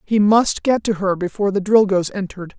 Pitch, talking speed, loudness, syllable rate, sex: 200 Hz, 210 wpm, -17 LUFS, 5.7 syllables/s, female